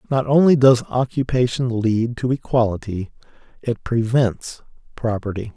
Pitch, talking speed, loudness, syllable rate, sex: 120 Hz, 110 wpm, -19 LUFS, 4.5 syllables/s, male